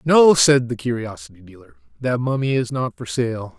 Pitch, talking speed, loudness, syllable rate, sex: 125 Hz, 185 wpm, -19 LUFS, 4.9 syllables/s, male